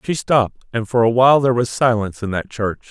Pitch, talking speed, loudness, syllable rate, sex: 115 Hz, 250 wpm, -17 LUFS, 6.5 syllables/s, male